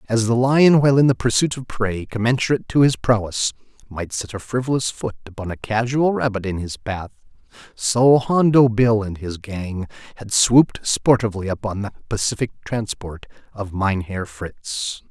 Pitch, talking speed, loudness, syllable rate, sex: 110 Hz, 165 wpm, -20 LUFS, 4.8 syllables/s, male